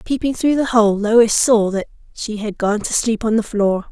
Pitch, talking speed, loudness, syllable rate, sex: 220 Hz, 230 wpm, -17 LUFS, 4.6 syllables/s, female